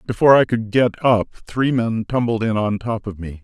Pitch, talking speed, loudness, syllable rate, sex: 115 Hz, 225 wpm, -18 LUFS, 5.4 syllables/s, male